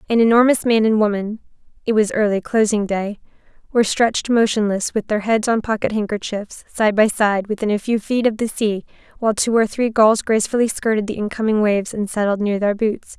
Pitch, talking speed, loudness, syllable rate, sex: 215 Hz, 200 wpm, -18 LUFS, 5.4 syllables/s, female